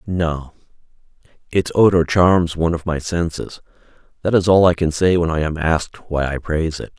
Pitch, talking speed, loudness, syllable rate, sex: 85 Hz, 180 wpm, -18 LUFS, 5.2 syllables/s, male